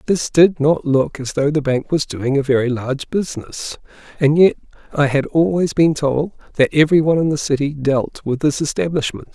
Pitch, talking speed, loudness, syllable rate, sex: 145 Hz, 200 wpm, -17 LUFS, 5.4 syllables/s, male